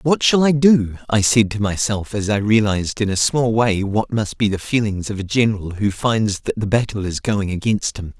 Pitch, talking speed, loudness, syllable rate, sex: 105 Hz, 235 wpm, -18 LUFS, 5.0 syllables/s, male